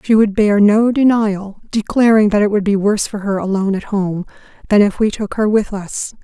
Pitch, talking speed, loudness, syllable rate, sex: 205 Hz, 220 wpm, -15 LUFS, 5.3 syllables/s, female